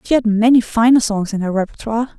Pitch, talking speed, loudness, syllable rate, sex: 225 Hz, 220 wpm, -15 LUFS, 6.2 syllables/s, female